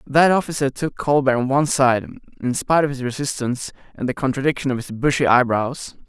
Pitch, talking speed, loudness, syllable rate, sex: 135 Hz, 190 wpm, -20 LUFS, 6.0 syllables/s, male